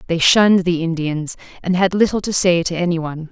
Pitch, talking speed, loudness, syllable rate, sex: 175 Hz, 215 wpm, -17 LUFS, 5.9 syllables/s, female